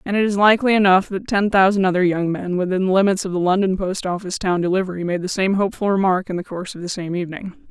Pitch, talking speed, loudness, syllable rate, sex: 190 Hz, 255 wpm, -19 LUFS, 6.9 syllables/s, female